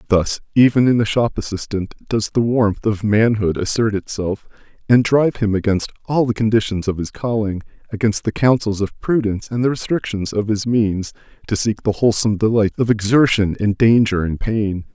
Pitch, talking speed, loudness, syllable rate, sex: 110 Hz, 180 wpm, -18 LUFS, 5.3 syllables/s, male